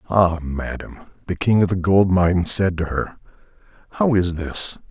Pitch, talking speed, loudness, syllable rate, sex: 90 Hz, 170 wpm, -19 LUFS, 4.6 syllables/s, male